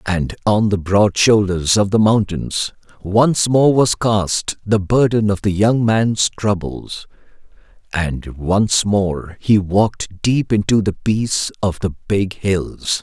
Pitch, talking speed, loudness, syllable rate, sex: 100 Hz, 145 wpm, -17 LUFS, 3.4 syllables/s, male